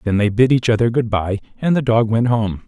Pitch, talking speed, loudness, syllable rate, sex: 115 Hz, 270 wpm, -17 LUFS, 5.5 syllables/s, male